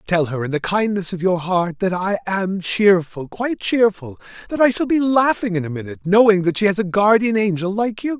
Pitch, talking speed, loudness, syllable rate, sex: 195 Hz, 225 wpm, -18 LUFS, 5.4 syllables/s, male